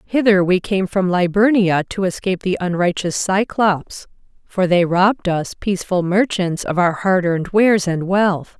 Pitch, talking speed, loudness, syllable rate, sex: 185 Hz, 160 wpm, -17 LUFS, 4.8 syllables/s, female